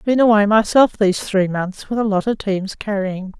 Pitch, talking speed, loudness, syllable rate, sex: 205 Hz, 210 wpm, -17 LUFS, 4.9 syllables/s, female